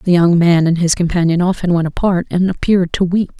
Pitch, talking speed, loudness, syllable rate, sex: 175 Hz, 230 wpm, -14 LUFS, 5.9 syllables/s, female